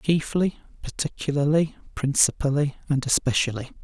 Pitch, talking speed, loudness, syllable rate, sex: 145 Hz, 80 wpm, -24 LUFS, 5.0 syllables/s, male